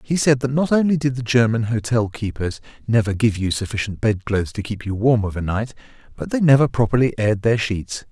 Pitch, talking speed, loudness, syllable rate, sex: 115 Hz, 215 wpm, -20 LUFS, 5.8 syllables/s, male